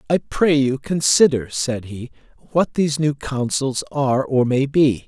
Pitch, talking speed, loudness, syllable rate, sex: 135 Hz, 165 wpm, -19 LUFS, 4.3 syllables/s, male